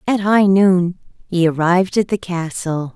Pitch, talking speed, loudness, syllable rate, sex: 180 Hz, 160 wpm, -16 LUFS, 4.3 syllables/s, female